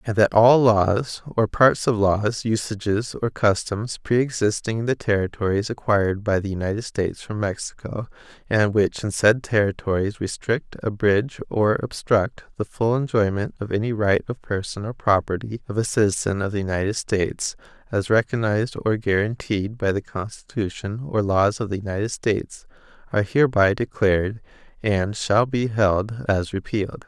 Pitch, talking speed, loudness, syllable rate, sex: 105 Hz, 155 wpm, -22 LUFS, 4.9 syllables/s, male